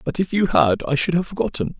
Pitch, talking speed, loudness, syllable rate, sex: 150 Hz, 265 wpm, -20 LUFS, 6.1 syllables/s, male